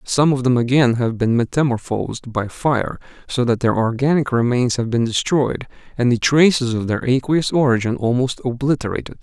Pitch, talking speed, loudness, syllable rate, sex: 125 Hz, 170 wpm, -18 LUFS, 5.2 syllables/s, male